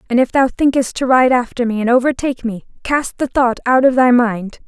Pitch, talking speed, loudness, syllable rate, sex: 250 Hz, 230 wpm, -15 LUFS, 5.4 syllables/s, female